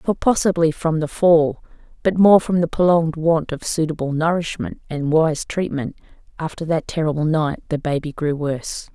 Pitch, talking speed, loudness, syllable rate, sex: 160 Hz, 170 wpm, -19 LUFS, 5.0 syllables/s, female